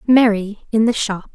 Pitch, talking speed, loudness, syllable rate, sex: 215 Hz, 180 wpm, -17 LUFS, 4.8 syllables/s, female